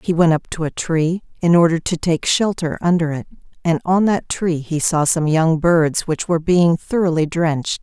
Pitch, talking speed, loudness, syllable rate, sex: 165 Hz, 205 wpm, -18 LUFS, 4.7 syllables/s, female